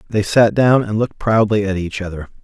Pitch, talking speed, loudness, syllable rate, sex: 105 Hz, 220 wpm, -16 LUFS, 5.6 syllables/s, male